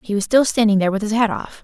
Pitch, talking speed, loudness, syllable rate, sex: 215 Hz, 330 wpm, -17 LUFS, 7.2 syllables/s, female